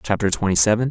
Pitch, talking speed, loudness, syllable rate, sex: 105 Hz, 200 wpm, -18 LUFS, 7.4 syllables/s, male